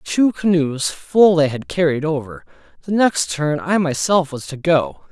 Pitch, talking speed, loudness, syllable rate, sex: 160 Hz, 175 wpm, -18 LUFS, 4.1 syllables/s, male